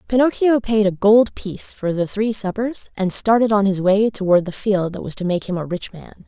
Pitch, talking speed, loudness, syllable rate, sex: 200 Hz, 240 wpm, -19 LUFS, 5.1 syllables/s, female